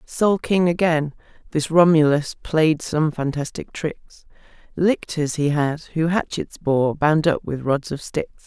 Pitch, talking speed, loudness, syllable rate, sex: 155 Hz, 150 wpm, -21 LUFS, 3.8 syllables/s, female